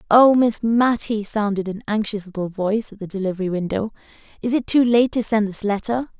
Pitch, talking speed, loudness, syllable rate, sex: 215 Hz, 195 wpm, -20 LUFS, 5.6 syllables/s, female